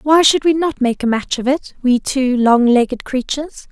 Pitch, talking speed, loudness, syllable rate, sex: 265 Hz, 225 wpm, -16 LUFS, 4.8 syllables/s, female